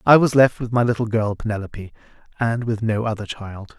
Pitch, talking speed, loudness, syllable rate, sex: 110 Hz, 205 wpm, -20 LUFS, 5.6 syllables/s, male